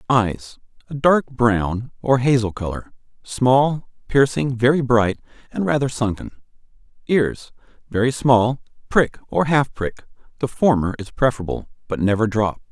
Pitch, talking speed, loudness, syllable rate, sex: 125 Hz, 125 wpm, -20 LUFS, 3.8 syllables/s, male